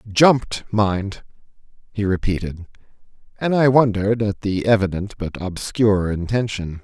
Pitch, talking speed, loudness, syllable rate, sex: 105 Hz, 105 wpm, -20 LUFS, 4.5 syllables/s, male